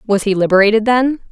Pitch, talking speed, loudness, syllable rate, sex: 215 Hz, 185 wpm, -13 LUFS, 6.4 syllables/s, female